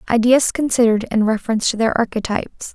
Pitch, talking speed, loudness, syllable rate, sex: 230 Hz, 155 wpm, -17 LUFS, 6.8 syllables/s, female